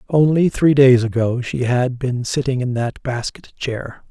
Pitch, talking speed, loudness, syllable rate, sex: 130 Hz, 175 wpm, -18 LUFS, 4.2 syllables/s, male